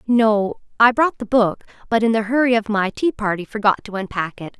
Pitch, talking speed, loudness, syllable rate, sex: 220 Hz, 220 wpm, -19 LUFS, 5.3 syllables/s, female